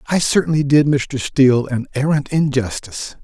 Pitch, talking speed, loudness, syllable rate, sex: 135 Hz, 150 wpm, -17 LUFS, 5.0 syllables/s, male